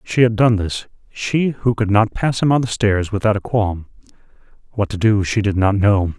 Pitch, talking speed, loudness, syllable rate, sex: 105 Hz, 215 wpm, -18 LUFS, 4.9 syllables/s, male